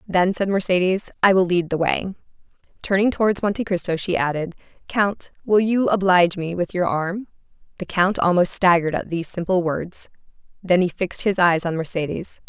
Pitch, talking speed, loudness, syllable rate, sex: 185 Hz, 180 wpm, -20 LUFS, 5.4 syllables/s, female